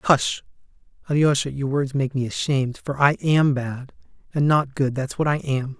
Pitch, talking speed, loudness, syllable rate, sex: 140 Hz, 175 wpm, -22 LUFS, 4.8 syllables/s, male